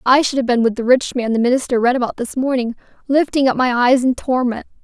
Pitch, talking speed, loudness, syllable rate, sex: 250 Hz, 250 wpm, -17 LUFS, 6.1 syllables/s, female